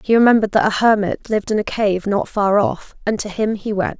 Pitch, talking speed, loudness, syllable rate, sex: 210 Hz, 255 wpm, -18 LUFS, 5.8 syllables/s, female